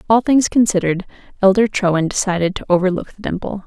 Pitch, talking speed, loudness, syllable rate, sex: 195 Hz, 165 wpm, -17 LUFS, 6.4 syllables/s, female